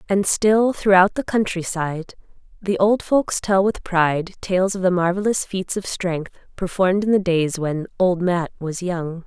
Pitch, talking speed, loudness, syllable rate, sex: 185 Hz, 180 wpm, -20 LUFS, 4.3 syllables/s, female